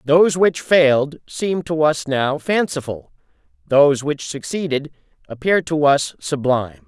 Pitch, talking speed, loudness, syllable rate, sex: 150 Hz, 130 wpm, -18 LUFS, 4.4 syllables/s, male